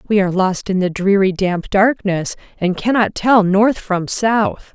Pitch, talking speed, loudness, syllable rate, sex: 200 Hz, 175 wpm, -16 LUFS, 4.1 syllables/s, female